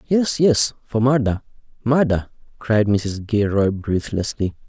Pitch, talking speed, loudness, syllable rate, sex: 115 Hz, 105 wpm, -20 LUFS, 3.9 syllables/s, male